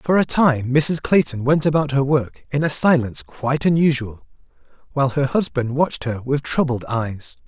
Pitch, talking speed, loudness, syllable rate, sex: 140 Hz, 175 wpm, -19 LUFS, 5.1 syllables/s, male